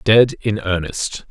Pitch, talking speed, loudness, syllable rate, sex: 105 Hz, 140 wpm, -18 LUFS, 3.7 syllables/s, male